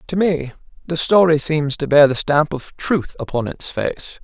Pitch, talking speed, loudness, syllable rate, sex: 150 Hz, 200 wpm, -18 LUFS, 4.4 syllables/s, male